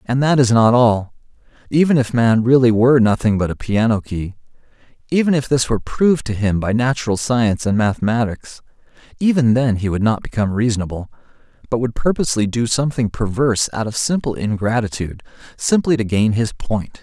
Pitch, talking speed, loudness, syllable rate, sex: 115 Hz, 175 wpm, -17 LUFS, 5.8 syllables/s, male